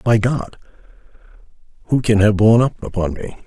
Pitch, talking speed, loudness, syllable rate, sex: 110 Hz, 140 wpm, -17 LUFS, 5.1 syllables/s, male